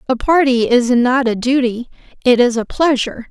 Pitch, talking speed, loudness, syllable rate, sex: 250 Hz, 180 wpm, -15 LUFS, 5.1 syllables/s, female